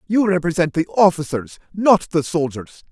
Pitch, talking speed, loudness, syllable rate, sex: 160 Hz, 145 wpm, -18 LUFS, 4.9 syllables/s, male